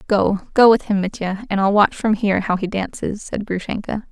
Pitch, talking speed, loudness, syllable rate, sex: 205 Hz, 220 wpm, -19 LUFS, 5.4 syllables/s, female